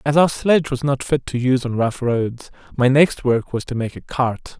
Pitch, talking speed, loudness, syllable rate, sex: 130 Hz, 250 wpm, -19 LUFS, 5.0 syllables/s, male